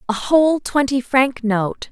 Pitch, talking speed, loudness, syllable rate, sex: 255 Hz, 155 wpm, -17 LUFS, 4.1 syllables/s, female